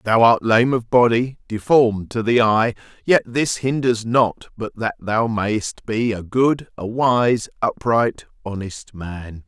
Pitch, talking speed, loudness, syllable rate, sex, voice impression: 115 Hz, 160 wpm, -19 LUFS, 3.7 syllables/s, male, masculine, adult-like, slightly thick, cool, slightly intellectual, slightly calm, slightly elegant